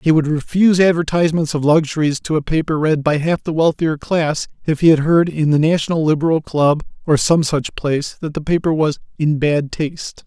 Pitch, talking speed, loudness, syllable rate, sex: 155 Hz, 205 wpm, -17 LUFS, 5.4 syllables/s, male